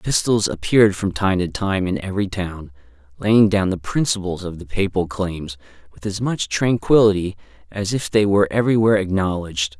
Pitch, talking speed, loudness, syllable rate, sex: 95 Hz, 165 wpm, -19 LUFS, 5.5 syllables/s, male